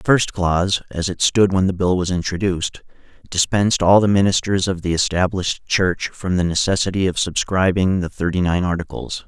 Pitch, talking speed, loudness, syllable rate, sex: 95 Hz, 180 wpm, -19 LUFS, 5.4 syllables/s, male